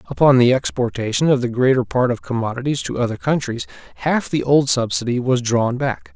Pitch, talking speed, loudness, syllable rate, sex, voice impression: 130 Hz, 185 wpm, -19 LUFS, 5.4 syllables/s, male, very masculine, very adult-like, thick, tensed, very powerful, slightly bright, hard, very clear, fluent, raspy, cool, intellectual, very refreshing, sincere, calm, mature, friendly, very reassuring, unique, elegant, wild, slightly sweet, lively, strict, slightly intense